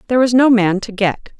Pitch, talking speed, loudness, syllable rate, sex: 220 Hz, 255 wpm, -14 LUFS, 6.0 syllables/s, female